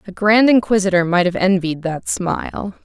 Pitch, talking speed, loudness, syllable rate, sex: 190 Hz, 170 wpm, -16 LUFS, 4.9 syllables/s, female